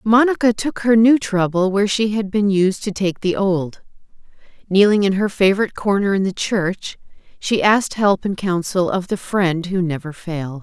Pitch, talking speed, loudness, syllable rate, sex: 195 Hz, 185 wpm, -18 LUFS, 4.8 syllables/s, female